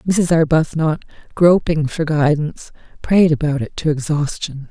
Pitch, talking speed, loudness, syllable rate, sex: 155 Hz, 125 wpm, -17 LUFS, 4.6 syllables/s, female